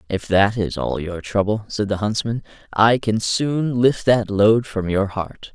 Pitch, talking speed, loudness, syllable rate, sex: 105 Hz, 195 wpm, -20 LUFS, 4.0 syllables/s, male